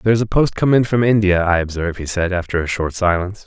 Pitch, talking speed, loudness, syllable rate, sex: 95 Hz, 275 wpm, -17 LUFS, 6.7 syllables/s, male